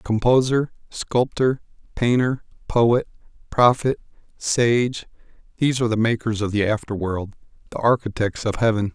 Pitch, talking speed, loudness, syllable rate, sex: 115 Hz, 120 wpm, -21 LUFS, 4.7 syllables/s, male